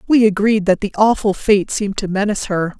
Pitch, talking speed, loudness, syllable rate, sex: 205 Hz, 215 wpm, -16 LUFS, 5.8 syllables/s, female